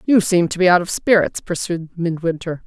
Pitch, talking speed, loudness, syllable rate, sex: 175 Hz, 200 wpm, -18 LUFS, 5.2 syllables/s, female